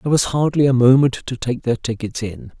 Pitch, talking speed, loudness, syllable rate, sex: 125 Hz, 230 wpm, -18 LUFS, 5.7 syllables/s, male